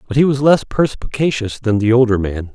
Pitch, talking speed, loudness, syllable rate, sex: 120 Hz, 210 wpm, -16 LUFS, 5.4 syllables/s, male